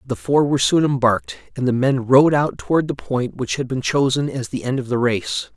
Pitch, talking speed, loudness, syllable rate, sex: 130 Hz, 250 wpm, -19 LUFS, 5.5 syllables/s, male